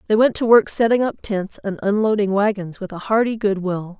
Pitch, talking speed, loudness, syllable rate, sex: 205 Hz, 225 wpm, -19 LUFS, 5.4 syllables/s, female